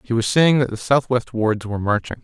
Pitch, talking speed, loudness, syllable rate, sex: 120 Hz, 240 wpm, -19 LUFS, 5.7 syllables/s, male